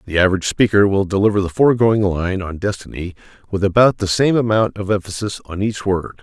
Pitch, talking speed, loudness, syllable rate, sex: 100 Hz, 195 wpm, -17 LUFS, 6.0 syllables/s, male